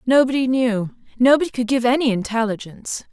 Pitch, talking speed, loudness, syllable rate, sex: 245 Hz, 135 wpm, -19 LUFS, 5.9 syllables/s, female